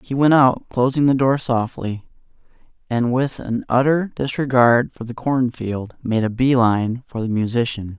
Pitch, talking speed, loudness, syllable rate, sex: 125 Hz, 175 wpm, -19 LUFS, 4.3 syllables/s, male